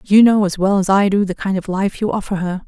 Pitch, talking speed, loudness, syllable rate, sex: 195 Hz, 315 wpm, -16 LUFS, 5.9 syllables/s, female